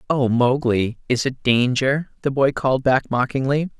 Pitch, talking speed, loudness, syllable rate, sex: 130 Hz, 160 wpm, -20 LUFS, 4.6 syllables/s, male